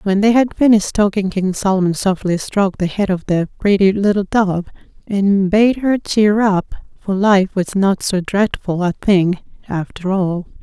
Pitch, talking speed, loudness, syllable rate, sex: 195 Hz, 175 wpm, -16 LUFS, 4.5 syllables/s, female